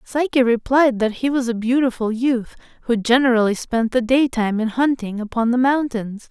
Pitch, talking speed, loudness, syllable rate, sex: 240 Hz, 170 wpm, -19 LUFS, 5.1 syllables/s, female